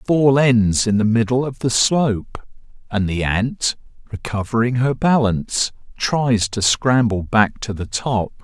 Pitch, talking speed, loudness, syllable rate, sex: 115 Hz, 155 wpm, -18 LUFS, 4.1 syllables/s, male